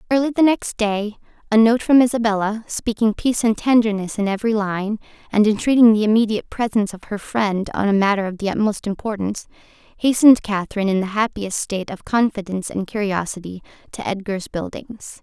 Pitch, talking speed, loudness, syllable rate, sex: 210 Hz, 170 wpm, -19 LUFS, 5.8 syllables/s, female